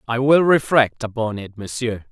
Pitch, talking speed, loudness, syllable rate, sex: 120 Hz, 170 wpm, -18 LUFS, 4.6 syllables/s, male